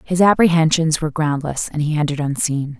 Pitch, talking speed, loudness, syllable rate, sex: 155 Hz, 170 wpm, -18 LUFS, 6.0 syllables/s, female